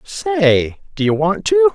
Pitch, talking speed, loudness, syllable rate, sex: 125 Hz, 140 wpm, -16 LUFS, 3.9 syllables/s, male